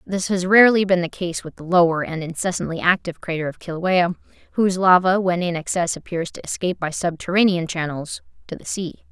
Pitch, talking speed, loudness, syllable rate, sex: 175 Hz, 190 wpm, -20 LUFS, 6.0 syllables/s, female